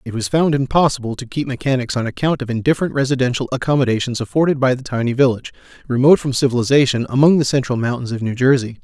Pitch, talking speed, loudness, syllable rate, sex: 130 Hz, 190 wpm, -17 LUFS, 7.1 syllables/s, male